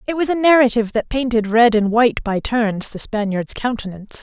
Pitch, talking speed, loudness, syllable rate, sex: 230 Hz, 200 wpm, -17 LUFS, 5.7 syllables/s, female